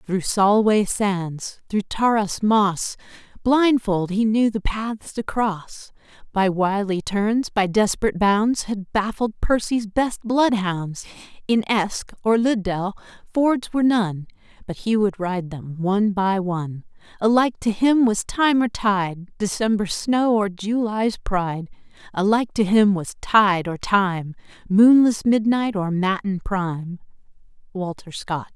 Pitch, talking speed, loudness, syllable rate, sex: 205 Hz, 135 wpm, -21 LUFS, 3.9 syllables/s, female